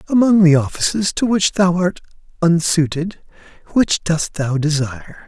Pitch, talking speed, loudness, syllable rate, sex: 170 Hz, 135 wpm, -17 LUFS, 4.6 syllables/s, male